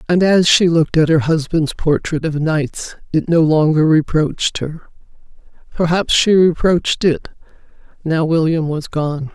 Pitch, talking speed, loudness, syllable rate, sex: 160 Hz, 140 wpm, -15 LUFS, 4.5 syllables/s, female